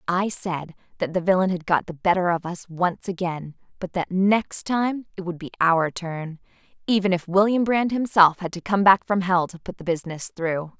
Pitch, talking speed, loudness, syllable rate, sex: 180 Hz, 210 wpm, -23 LUFS, 4.9 syllables/s, female